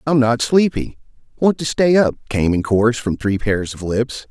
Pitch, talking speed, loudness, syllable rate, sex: 120 Hz, 210 wpm, -18 LUFS, 4.6 syllables/s, male